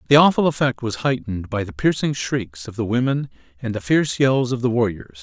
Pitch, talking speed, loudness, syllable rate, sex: 120 Hz, 220 wpm, -21 LUFS, 5.7 syllables/s, male